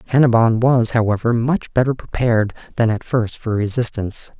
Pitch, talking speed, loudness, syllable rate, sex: 115 Hz, 150 wpm, -18 LUFS, 5.3 syllables/s, male